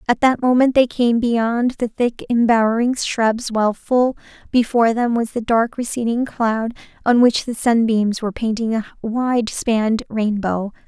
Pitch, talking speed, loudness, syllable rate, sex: 230 Hz, 160 wpm, -18 LUFS, 4.5 syllables/s, female